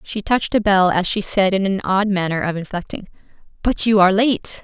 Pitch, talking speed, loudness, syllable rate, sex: 195 Hz, 220 wpm, -18 LUFS, 5.6 syllables/s, female